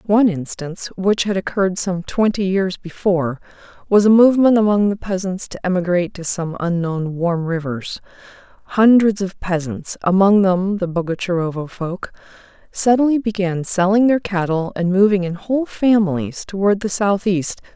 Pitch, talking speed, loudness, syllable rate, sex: 190 Hz, 145 wpm, -18 LUFS, 5.0 syllables/s, female